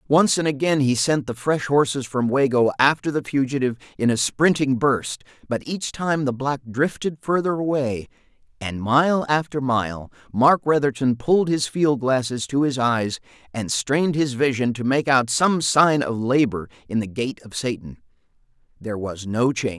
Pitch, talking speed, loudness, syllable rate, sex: 130 Hz, 175 wpm, -21 LUFS, 4.7 syllables/s, male